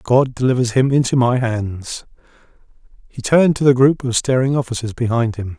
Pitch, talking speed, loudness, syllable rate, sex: 125 Hz, 170 wpm, -17 LUFS, 5.4 syllables/s, male